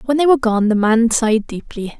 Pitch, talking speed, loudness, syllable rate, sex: 235 Hz, 240 wpm, -15 LUFS, 6.0 syllables/s, female